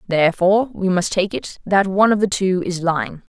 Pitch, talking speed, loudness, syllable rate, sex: 185 Hz, 215 wpm, -18 LUFS, 5.8 syllables/s, female